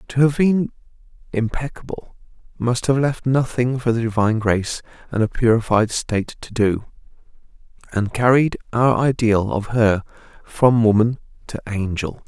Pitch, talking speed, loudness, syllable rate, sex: 115 Hz, 135 wpm, -19 LUFS, 4.7 syllables/s, male